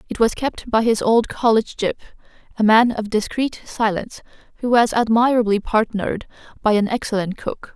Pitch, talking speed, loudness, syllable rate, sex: 220 Hz, 160 wpm, -19 LUFS, 5.4 syllables/s, female